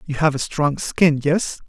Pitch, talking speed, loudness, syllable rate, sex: 150 Hz, 180 wpm, -19 LUFS, 4.1 syllables/s, male